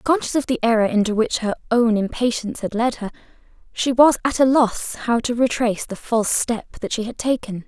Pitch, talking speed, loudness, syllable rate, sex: 235 Hz, 210 wpm, -20 LUFS, 5.7 syllables/s, female